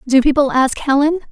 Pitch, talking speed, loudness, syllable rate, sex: 275 Hz, 185 wpm, -15 LUFS, 5.7 syllables/s, female